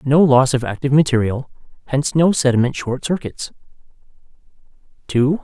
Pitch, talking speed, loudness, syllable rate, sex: 135 Hz, 120 wpm, -17 LUFS, 5.6 syllables/s, male